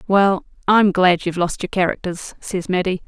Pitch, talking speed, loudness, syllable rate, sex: 185 Hz, 175 wpm, -18 LUFS, 5.0 syllables/s, female